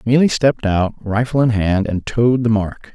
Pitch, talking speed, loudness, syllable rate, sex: 110 Hz, 205 wpm, -17 LUFS, 4.6 syllables/s, male